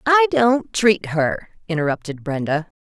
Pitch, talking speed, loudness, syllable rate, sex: 190 Hz, 125 wpm, -19 LUFS, 4.3 syllables/s, female